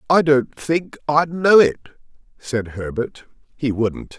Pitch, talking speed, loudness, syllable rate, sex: 140 Hz, 145 wpm, -19 LUFS, 4.1 syllables/s, male